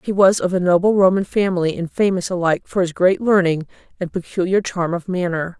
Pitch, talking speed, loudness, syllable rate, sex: 180 Hz, 205 wpm, -18 LUFS, 5.8 syllables/s, female